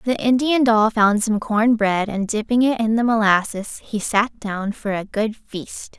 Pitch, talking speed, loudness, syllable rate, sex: 220 Hz, 200 wpm, -19 LUFS, 4.1 syllables/s, female